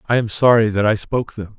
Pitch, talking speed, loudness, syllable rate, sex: 110 Hz, 265 wpm, -17 LUFS, 6.4 syllables/s, male